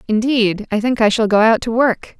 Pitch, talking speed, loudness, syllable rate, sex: 225 Hz, 245 wpm, -15 LUFS, 5.0 syllables/s, female